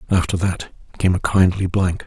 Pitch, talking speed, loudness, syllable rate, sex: 90 Hz, 175 wpm, -19 LUFS, 4.9 syllables/s, male